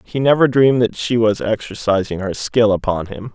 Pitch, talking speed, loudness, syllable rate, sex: 110 Hz, 195 wpm, -17 LUFS, 5.2 syllables/s, male